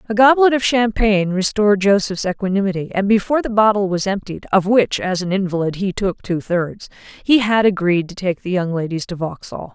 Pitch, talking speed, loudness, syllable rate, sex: 195 Hz, 195 wpm, -17 LUFS, 5.5 syllables/s, female